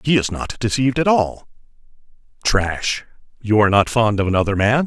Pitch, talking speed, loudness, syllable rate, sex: 115 Hz, 160 wpm, -18 LUFS, 5.5 syllables/s, male